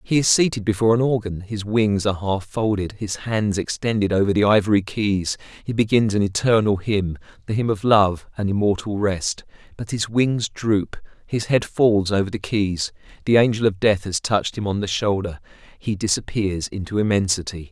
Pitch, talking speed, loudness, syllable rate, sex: 105 Hz, 185 wpm, -21 LUFS, 5.1 syllables/s, male